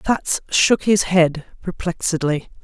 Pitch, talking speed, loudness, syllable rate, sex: 175 Hz, 115 wpm, -18 LUFS, 3.7 syllables/s, female